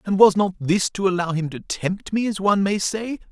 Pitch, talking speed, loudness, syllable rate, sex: 195 Hz, 255 wpm, -21 LUFS, 5.2 syllables/s, male